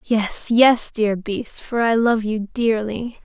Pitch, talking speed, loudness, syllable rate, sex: 225 Hz, 165 wpm, -19 LUFS, 3.3 syllables/s, female